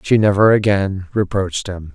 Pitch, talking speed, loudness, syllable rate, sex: 100 Hz, 155 wpm, -16 LUFS, 5.0 syllables/s, male